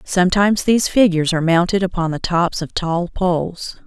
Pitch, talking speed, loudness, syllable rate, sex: 180 Hz, 170 wpm, -17 LUFS, 5.7 syllables/s, female